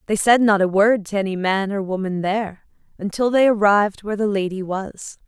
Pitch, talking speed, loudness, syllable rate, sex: 200 Hz, 205 wpm, -19 LUFS, 5.5 syllables/s, female